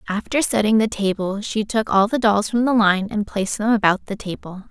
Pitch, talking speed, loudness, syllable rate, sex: 210 Hz, 230 wpm, -19 LUFS, 5.4 syllables/s, female